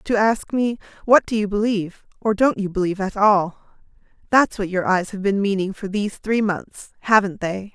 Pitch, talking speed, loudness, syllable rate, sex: 205 Hz, 200 wpm, -20 LUFS, 5.1 syllables/s, female